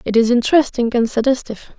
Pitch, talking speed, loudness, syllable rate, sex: 240 Hz, 170 wpm, -16 LUFS, 6.8 syllables/s, female